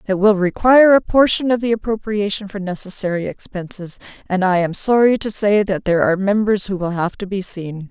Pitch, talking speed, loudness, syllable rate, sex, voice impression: 200 Hz, 205 wpm, -17 LUFS, 5.6 syllables/s, female, very feminine, adult-like, thin, slightly relaxed, slightly weak, slightly bright, slightly soft, clear, fluent, cute, slightly cool, intellectual, refreshing, very sincere, very calm, friendly, reassuring, slightly unique, elegant, slightly wild, sweet, lively, kind, slightly modest, slightly light